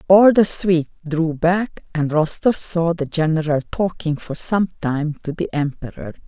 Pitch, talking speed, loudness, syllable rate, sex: 165 Hz, 165 wpm, -19 LUFS, 4.3 syllables/s, female